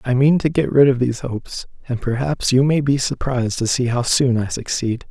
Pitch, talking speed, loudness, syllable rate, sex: 130 Hz, 235 wpm, -18 LUFS, 5.4 syllables/s, male